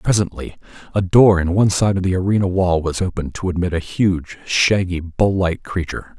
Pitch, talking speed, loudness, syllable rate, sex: 90 Hz, 195 wpm, -18 LUFS, 5.5 syllables/s, male